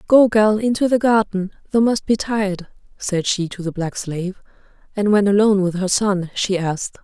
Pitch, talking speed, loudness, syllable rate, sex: 200 Hz, 195 wpm, -18 LUFS, 5.2 syllables/s, female